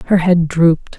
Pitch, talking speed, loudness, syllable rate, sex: 170 Hz, 185 wpm, -13 LUFS, 5.1 syllables/s, female